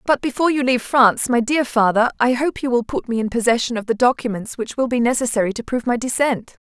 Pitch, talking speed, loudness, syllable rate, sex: 240 Hz, 245 wpm, -19 LUFS, 6.5 syllables/s, female